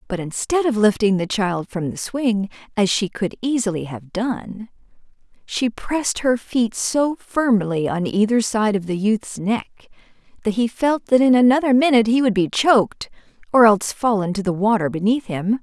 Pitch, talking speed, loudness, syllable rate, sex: 220 Hz, 180 wpm, -19 LUFS, 4.7 syllables/s, female